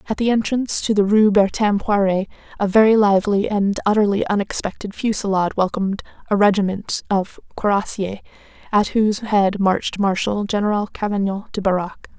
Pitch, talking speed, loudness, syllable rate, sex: 205 Hz, 145 wpm, -19 LUFS, 5.7 syllables/s, female